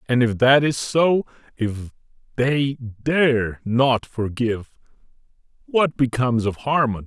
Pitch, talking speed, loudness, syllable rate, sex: 125 Hz, 120 wpm, -20 LUFS, 4.9 syllables/s, male